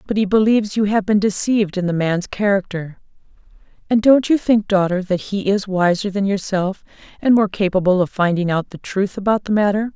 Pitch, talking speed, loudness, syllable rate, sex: 200 Hz, 200 wpm, -18 LUFS, 5.5 syllables/s, female